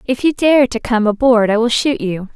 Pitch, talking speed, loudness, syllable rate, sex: 240 Hz, 255 wpm, -14 LUFS, 5.0 syllables/s, female